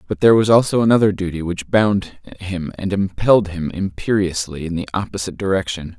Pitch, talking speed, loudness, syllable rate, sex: 95 Hz, 170 wpm, -18 LUFS, 5.7 syllables/s, male